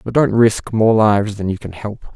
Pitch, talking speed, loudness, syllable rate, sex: 105 Hz, 250 wpm, -15 LUFS, 5.1 syllables/s, male